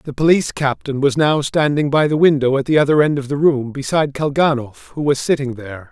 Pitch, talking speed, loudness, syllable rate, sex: 140 Hz, 225 wpm, -17 LUFS, 5.8 syllables/s, male